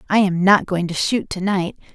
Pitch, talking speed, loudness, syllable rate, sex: 190 Hz, 245 wpm, -19 LUFS, 5.1 syllables/s, female